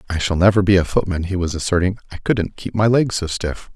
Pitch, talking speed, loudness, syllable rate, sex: 95 Hz, 255 wpm, -19 LUFS, 5.9 syllables/s, male